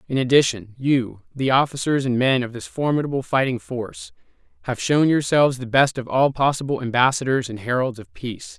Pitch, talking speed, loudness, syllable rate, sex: 130 Hz, 175 wpm, -21 LUFS, 5.6 syllables/s, male